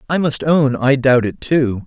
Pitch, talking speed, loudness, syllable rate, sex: 135 Hz, 225 wpm, -15 LUFS, 4.2 syllables/s, male